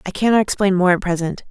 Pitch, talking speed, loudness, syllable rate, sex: 190 Hz, 240 wpm, -17 LUFS, 6.6 syllables/s, female